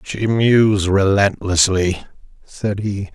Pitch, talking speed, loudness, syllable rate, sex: 100 Hz, 95 wpm, -17 LUFS, 3.1 syllables/s, male